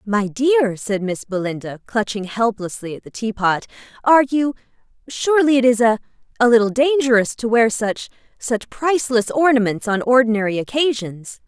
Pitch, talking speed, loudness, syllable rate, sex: 230 Hz, 130 wpm, -18 LUFS, 5.1 syllables/s, female